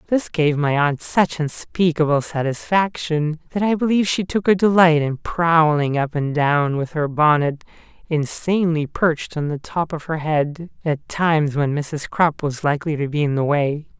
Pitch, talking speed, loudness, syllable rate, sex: 155 Hz, 180 wpm, -19 LUFS, 4.6 syllables/s, male